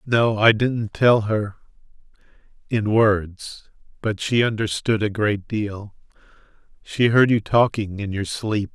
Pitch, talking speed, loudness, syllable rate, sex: 105 Hz, 135 wpm, -20 LUFS, 3.7 syllables/s, male